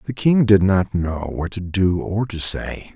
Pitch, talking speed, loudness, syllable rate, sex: 100 Hz, 225 wpm, -19 LUFS, 4.0 syllables/s, male